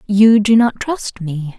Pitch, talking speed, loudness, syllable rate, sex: 210 Hz, 190 wpm, -14 LUFS, 3.5 syllables/s, female